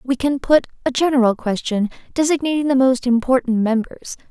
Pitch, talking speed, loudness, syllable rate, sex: 260 Hz, 155 wpm, -18 LUFS, 5.4 syllables/s, female